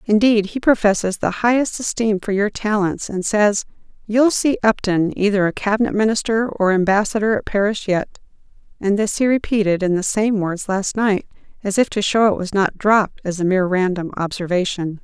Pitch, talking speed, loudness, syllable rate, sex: 205 Hz, 185 wpm, -18 LUFS, 5.2 syllables/s, female